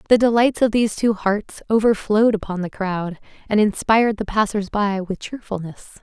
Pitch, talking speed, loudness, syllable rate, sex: 210 Hz, 170 wpm, -20 LUFS, 5.2 syllables/s, female